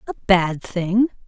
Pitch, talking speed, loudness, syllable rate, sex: 200 Hz, 140 wpm, -20 LUFS, 3.2 syllables/s, female